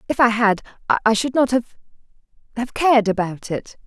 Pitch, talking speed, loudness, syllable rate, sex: 230 Hz, 155 wpm, -19 LUFS, 5.9 syllables/s, female